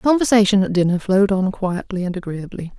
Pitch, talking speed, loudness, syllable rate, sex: 195 Hz, 195 wpm, -18 LUFS, 6.3 syllables/s, female